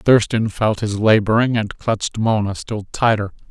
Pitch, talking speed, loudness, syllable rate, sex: 110 Hz, 155 wpm, -18 LUFS, 4.6 syllables/s, male